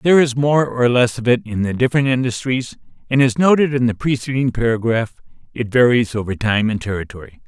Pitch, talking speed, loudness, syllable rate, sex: 120 Hz, 195 wpm, -17 LUFS, 5.7 syllables/s, male